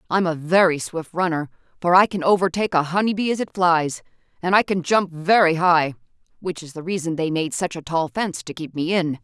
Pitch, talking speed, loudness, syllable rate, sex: 170 Hz, 225 wpm, -21 LUFS, 5.6 syllables/s, female